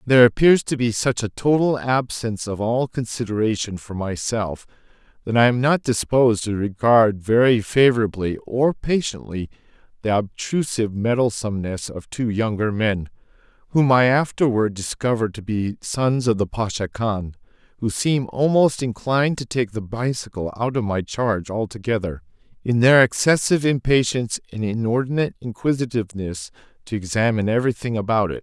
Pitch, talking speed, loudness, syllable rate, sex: 115 Hz, 140 wpm, -21 LUFS, 5.2 syllables/s, male